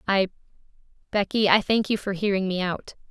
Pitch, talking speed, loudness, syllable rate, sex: 195 Hz, 155 wpm, -24 LUFS, 5.6 syllables/s, female